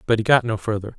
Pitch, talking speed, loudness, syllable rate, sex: 110 Hz, 305 wpm, -20 LUFS, 7.1 syllables/s, male